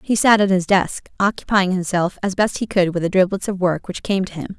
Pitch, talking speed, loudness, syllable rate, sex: 190 Hz, 260 wpm, -19 LUFS, 5.5 syllables/s, female